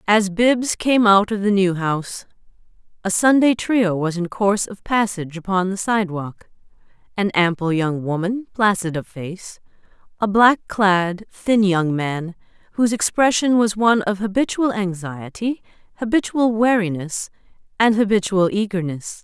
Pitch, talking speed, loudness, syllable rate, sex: 200 Hz, 135 wpm, -19 LUFS, 4.5 syllables/s, female